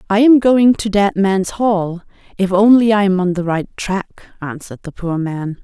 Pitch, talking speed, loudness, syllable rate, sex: 200 Hz, 200 wpm, -15 LUFS, 4.7 syllables/s, female